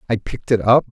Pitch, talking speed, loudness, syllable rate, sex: 110 Hz, 255 wpm, -18 LUFS, 7.4 syllables/s, male